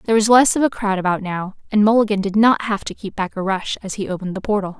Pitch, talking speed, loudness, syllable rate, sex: 205 Hz, 290 wpm, -18 LUFS, 6.6 syllables/s, female